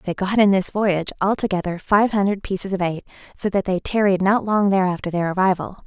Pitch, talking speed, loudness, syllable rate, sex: 190 Hz, 225 wpm, -20 LUFS, 6.1 syllables/s, female